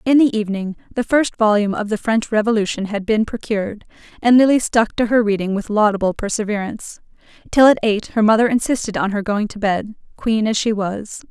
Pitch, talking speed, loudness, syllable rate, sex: 215 Hz, 195 wpm, -18 LUFS, 5.7 syllables/s, female